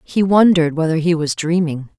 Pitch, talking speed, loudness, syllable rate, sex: 165 Hz, 180 wpm, -16 LUFS, 5.5 syllables/s, female